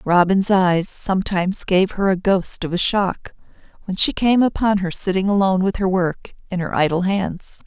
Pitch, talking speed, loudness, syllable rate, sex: 190 Hz, 190 wpm, -19 LUFS, 4.8 syllables/s, female